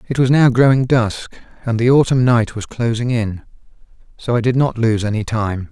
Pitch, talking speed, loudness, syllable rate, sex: 120 Hz, 200 wpm, -16 LUFS, 5.1 syllables/s, male